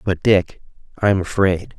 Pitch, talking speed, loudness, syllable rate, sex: 95 Hz, 135 wpm, -18 LUFS, 3.8 syllables/s, male